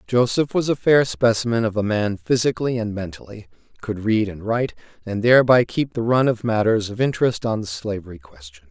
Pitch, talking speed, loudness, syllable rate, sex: 110 Hz, 195 wpm, -20 LUFS, 5.7 syllables/s, male